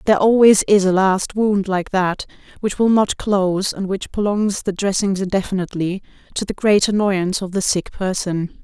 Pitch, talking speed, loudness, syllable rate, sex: 195 Hz, 180 wpm, -18 LUFS, 5.0 syllables/s, female